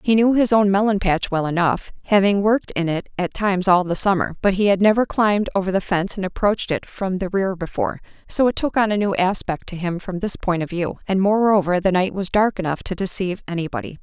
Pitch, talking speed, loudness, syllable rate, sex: 190 Hz, 240 wpm, -20 LUFS, 6.0 syllables/s, female